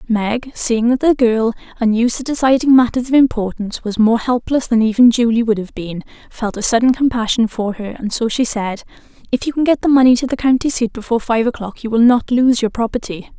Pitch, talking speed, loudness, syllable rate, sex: 235 Hz, 220 wpm, -16 LUFS, 5.7 syllables/s, female